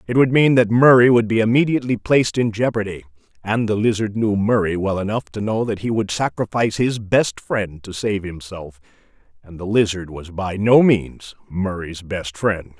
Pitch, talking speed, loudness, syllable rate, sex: 105 Hz, 190 wpm, -19 LUFS, 5.0 syllables/s, male